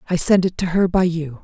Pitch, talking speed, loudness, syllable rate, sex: 175 Hz, 295 wpm, -18 LUFS, 5.7 syllables/s, female